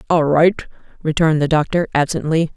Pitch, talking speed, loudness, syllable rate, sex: 155 Hz, 140 wpm, -17 LUFS, 6.1 syllables/s, female